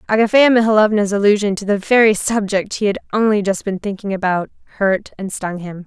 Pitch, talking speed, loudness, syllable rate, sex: 205 Hz, 185 wpm, -16 LUFS, 5.7 syllables/s, female